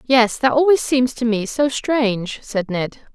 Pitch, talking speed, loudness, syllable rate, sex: 240 Hz, 190 wpm, -18 LUFS, 4.2 syllables/s, female